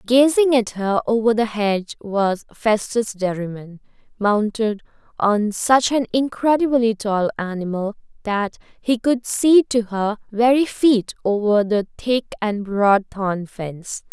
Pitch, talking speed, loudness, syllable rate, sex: 220 Hz, 130 wpm, -19 LUFS, 3.9 syllables/s, female